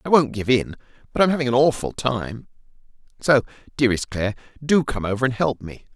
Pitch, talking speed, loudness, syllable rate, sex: 125 Hz, 200 wpm, -21 LUFS, 6.4 syllables/s, male